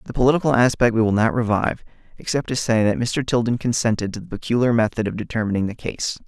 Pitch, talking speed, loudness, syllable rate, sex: 115 Hz, 210 wpm, -20 LUFS, 6.6 syllables/s, male